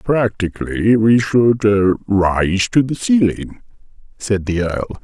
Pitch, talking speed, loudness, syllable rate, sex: 105 Hz, 120 wpm, -16 LUFS, 3.3 syllables/s, male